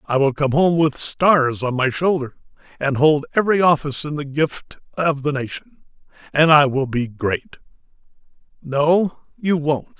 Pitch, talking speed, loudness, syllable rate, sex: 150 Hz, 160 wpm, -19 LUFS, 4.7 syllables/s, male